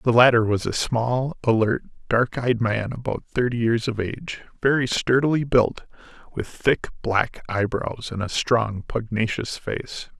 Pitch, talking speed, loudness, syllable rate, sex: 120 Hz, 155 wpm, -23 LUFS, 4.2 syllables/s, male